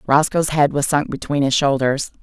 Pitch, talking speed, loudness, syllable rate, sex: 140 Hz, 190 wpm, -18 LUFS, 5.0 syllables/s, female